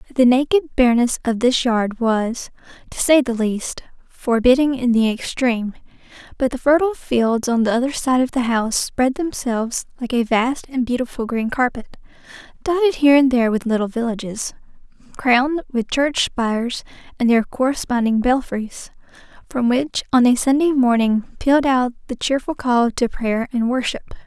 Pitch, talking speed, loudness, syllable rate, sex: 250 Hz, 160 wpm, -19 LUFS, 5.0 syllables/s, female